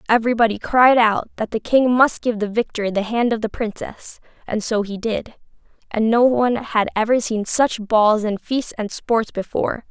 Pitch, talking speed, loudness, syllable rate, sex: 225 Hz, 195 wpm, -19 LUFS, 4.8 syllables/s, female